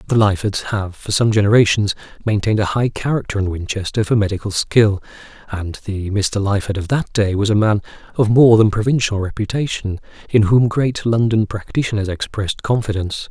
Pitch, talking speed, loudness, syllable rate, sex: 105 Hz, 165 wpm, -17 LUFS, 5.5 syllables/s, male